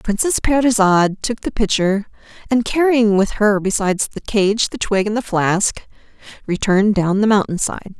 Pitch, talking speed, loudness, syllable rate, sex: 210 Hz, 165 wpm, -17 LUFS, 4.9 syllables/s, female